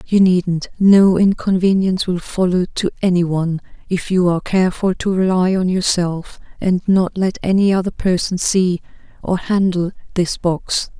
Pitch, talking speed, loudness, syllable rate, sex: 185 Hz, 155 wpm, -17 LUFS, 4.6 syllables/s, female